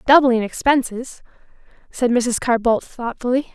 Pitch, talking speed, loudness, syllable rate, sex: 245 Hz, 120 wpm, -19 LUFS, 4.4 syllables/s, female